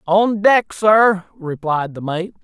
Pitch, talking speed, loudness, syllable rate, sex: 190 Hz, 150 wpm, -16 LUFS, 3.3 syllables/s, male